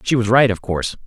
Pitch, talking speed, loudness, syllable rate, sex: 110 Hz, 280 wpm, -17 LUFS, 6.6 syllables/s, male